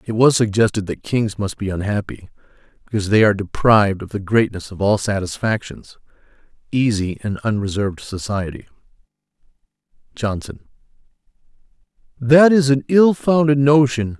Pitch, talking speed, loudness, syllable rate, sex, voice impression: 115 Hz, 125 wpm, -18 LUFS, 5.3 syllables/s, male, very masculine, very adult-like, very middle-aged, very thick, tensed, slightly powerful, slightly dark, slightly hard, slightly muffled, slightly fluent, cool, slightly intellectual, sincere, slightly calm, mature, slightly friendly, reassuring, slightly unique, wild, kind, modest